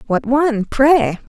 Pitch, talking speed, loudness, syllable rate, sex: 255 Hz, 135 wpm, -15 LUFS, 3.8 syllables/s, female